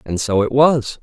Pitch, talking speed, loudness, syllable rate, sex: 115 Hz, 235 wpm, -16 LUFS, 4.4 syllables/s, male